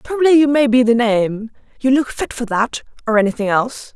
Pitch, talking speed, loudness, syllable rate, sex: 245 Hz, 210 wpm, -16 LUFS, 5.7 syllables/s, female